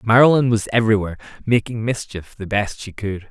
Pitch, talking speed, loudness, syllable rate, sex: 110 Hz, 165 wpm, -19 LUFS, 5.8 syllables/s, male